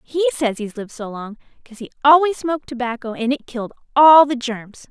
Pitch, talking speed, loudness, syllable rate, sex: 255 Hz, 210 wpm, -17 LUFS, 6.0 syllables/s, female